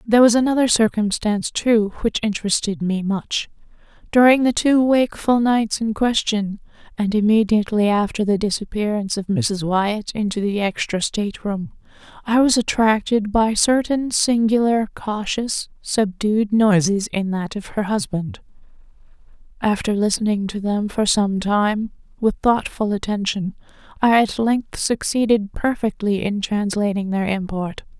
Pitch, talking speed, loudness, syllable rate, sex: 215 Hz, 135 wpm, -19 LUFS, 4.5 syllables/s, female